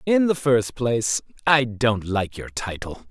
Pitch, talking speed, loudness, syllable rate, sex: 120 Hz, 175 wpm, -22 LUFS, 4.1 syllables/s, male